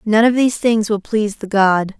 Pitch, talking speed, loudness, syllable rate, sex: 215 Hz, 240 wpm, -16 LUFS, 5.4 syllables/s, female